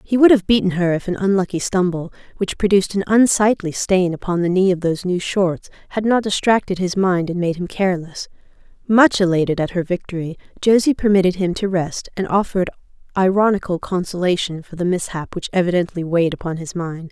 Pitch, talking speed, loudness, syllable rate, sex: 185 Hz, 185 wpm, -18 LUFS, 5.8 syllables/s, female